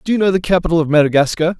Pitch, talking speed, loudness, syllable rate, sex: 170 Hz, 265 wpm, -15 LUFS, 8.1 syllables/s, male